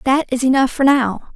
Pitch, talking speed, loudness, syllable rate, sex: 260 Hz, 220 wpm, -16 LUFS, 5.2 syllables/s, female